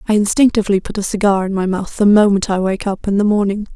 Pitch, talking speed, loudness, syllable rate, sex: 200 Hz, 255 wpm, -15 LUFS, 6.5 syllables/s, female